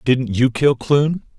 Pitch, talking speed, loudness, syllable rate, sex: 130 Hz, 175 wpm, -17 LUFS, 3.5 syllables/s, male